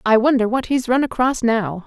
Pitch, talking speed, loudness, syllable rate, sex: 235 Hz, 225 wpm, -18 LUFS, 5.1 syllables/s, female